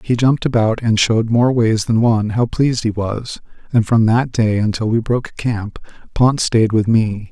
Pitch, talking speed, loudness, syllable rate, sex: 115 Hz, 205 wpm, -16 LUFS, 4.9 syllables/s, male